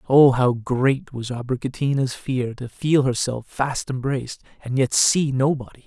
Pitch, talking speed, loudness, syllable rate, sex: 130 Hz, 155 wpm, -21 LUFS, 4.5 syllables/s, male